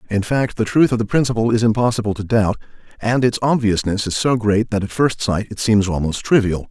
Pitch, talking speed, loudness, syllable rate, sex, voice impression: 110 Hz, 225 wpm, -18 LUFS, 5.7 syllables/s, male, masculine, very adult-like, slightly thick, fluent, cool, slightly intellectual, slightly calm, slightly kind